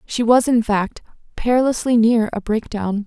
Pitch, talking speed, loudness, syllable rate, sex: 225 Hz, 155 wpm, -18 LUFS, 4.6 syllables/s, female